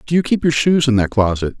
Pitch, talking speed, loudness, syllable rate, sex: 130 Hz, 300 wpm, -16 LUFS, 6.3 syllables/s, male